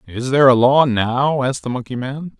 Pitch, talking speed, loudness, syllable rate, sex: 130 Hz, 225 wpm, -16 LUFS, 5.4 syllables/s, male